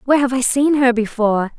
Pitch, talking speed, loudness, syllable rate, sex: 250 Hz, 225 wpm, -16 LUFS, 6.3 syllables/s, female